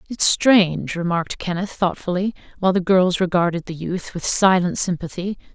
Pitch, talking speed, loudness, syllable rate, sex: 180 Hz, 150 wpm, -20 LUFS, 5.3 syllables/s, female